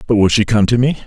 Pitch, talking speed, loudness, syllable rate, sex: 115 Hz, 340 wpm, -14 LUFS, 6.9 syllables/s, male